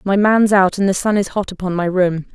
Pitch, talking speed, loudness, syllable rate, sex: 190 Hz, 280 wpm, -16 LUFS, 5.5 syllables/s, female